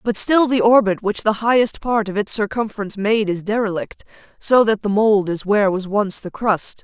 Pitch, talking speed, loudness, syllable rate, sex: 210 Hz, 210 wpm, -18 LUFS, 5.2 syllables/s, female